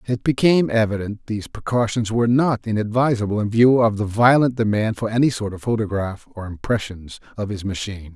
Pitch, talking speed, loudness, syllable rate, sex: 110 Hz, 175 wpm, -20 LUFS, 5.8 syllables/s, male